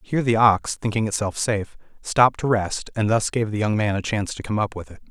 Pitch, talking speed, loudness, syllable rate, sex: 105 Hz, 260 wpm, -22 LUFS, 6.1 syllables/s, male